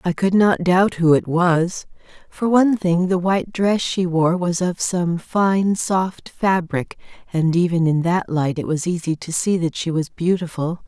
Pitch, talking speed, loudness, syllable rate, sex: 175 Hz, 195 wpm, -19 LUFS, 4.2 syllables/s, female